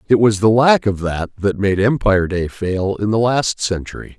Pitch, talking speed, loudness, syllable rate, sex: 105 Hz, 215 wpm, -17 LUFS, 4.7 syllables/s, male